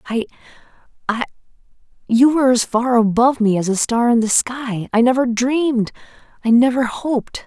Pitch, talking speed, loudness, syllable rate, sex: 240 Hz, 130 wpm, -17 LUFS, 5.4 syllables/s, female